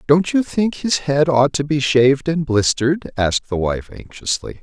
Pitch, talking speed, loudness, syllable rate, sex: 140 Hz, 195 wpm, -18 LUFS, 4.8 syllables/s, male